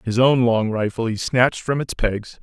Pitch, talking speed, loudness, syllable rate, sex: 120 Hz, 225 wpm, -20 LUFS, 4.7 syllables/s, male